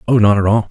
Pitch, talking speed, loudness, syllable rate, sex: 105 Hz, 255 wpm, -13 LUFS, 7.4 syllables/s, male